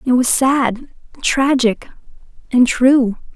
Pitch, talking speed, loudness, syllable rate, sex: 255 Hz, 90 wpm, -15 LUFS, 3.3 syllables/s, female